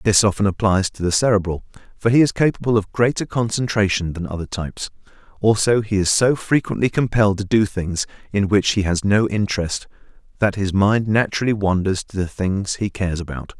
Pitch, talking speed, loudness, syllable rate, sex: 100 Hz, 185 wpm, -19 LUFS, 5.7 syllables/s, male